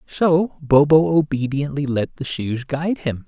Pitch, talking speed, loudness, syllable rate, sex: 145 Hz, 145 wpm, -19 LUFS, 4.2 syllables/s, male